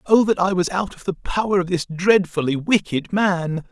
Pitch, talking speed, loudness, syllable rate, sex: 185 Hz, 210 wpm, -20 LUFS, 4.9 syllables/s, male